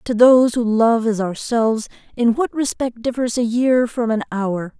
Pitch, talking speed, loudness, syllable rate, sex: 235 Hz, 190 wpm, -18 LUFS, 4.6 syllables/s, female